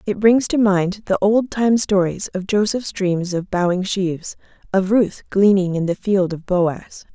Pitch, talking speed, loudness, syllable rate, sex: 195 Hz, 185 wpm, -18 LUFS, 4.2 syllables/s, female